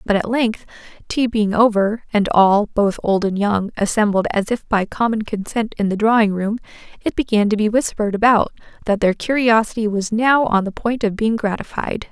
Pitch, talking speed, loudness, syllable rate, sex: 215 Hz, 195 wpm, -18 LUFS, 5.1 syllables/s, female